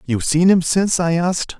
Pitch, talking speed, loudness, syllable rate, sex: 170 Hz, 225 wpm, -16 LUFS, 6.0 syllables/s, male